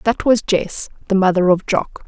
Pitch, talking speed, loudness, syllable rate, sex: 200 Hz, 205 wpm, -17 LUFS, 4.7 syllables/s, female